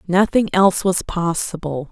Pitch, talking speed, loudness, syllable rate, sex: 180 Hz, 125 wpm, -18 LUFS, 4.6 syllables/s, female